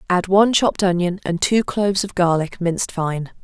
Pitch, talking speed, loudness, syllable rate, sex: 185 Hz, 190 wpm, -19 LUFS, 5.4 syllables/s, female